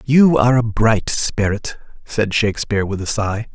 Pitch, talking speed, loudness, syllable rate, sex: 110 Hz, 170 wpm, -17 LUFS, 4.8 syllables/s, male